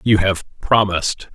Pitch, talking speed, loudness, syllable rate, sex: 100 Hz, 135 wpm, -18 LUFS, 4.7 syllables/s, male